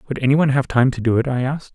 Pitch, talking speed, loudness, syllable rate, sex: 130 Hz, 310 wpm, -18 LUFS, 7.6 syllables/s, male